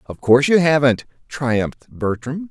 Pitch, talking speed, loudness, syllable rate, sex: 135 Hz, 145 wpm, -18 LUFS, 4.8 syllables/s, male